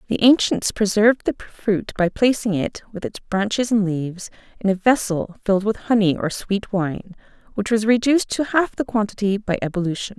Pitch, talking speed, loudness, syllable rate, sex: 210 Hz, 185 wpm, -20 LUFS, 5.3 syllables/s, female